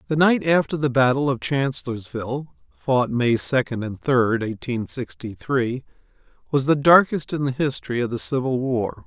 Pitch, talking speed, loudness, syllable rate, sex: 135 Hz, 170 wpm, -21 LUFS, 3.8 syllables/s, male